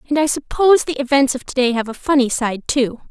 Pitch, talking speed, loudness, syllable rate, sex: 265 Hz, 230 wpm, -17 LUFS, 5.9 syllables/s, female